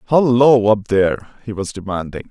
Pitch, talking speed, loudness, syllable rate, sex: 110 Hz, 155 wpm, -16 LUFS, 5.4 syllables/s, male